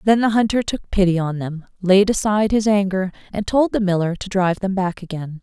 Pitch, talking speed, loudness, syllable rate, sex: 195 Hz, 220 wpm, -19 LUFS, 5.7 syllables/s, female